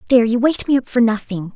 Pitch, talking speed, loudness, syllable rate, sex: 240 Hz, 270 wpm, -17 LUFS, 7.5 syllables/s, female